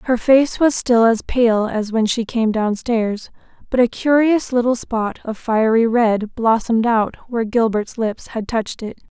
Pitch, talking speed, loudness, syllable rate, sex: 230 Hz, 175 wpm, -18 LUFS, 4.3 syllables/s, female